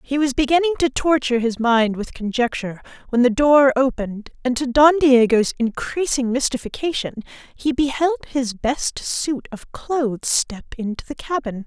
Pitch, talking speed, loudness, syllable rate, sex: 260 Hz, 155 wpm, -19 LUFS, 4.8 syllables/s, female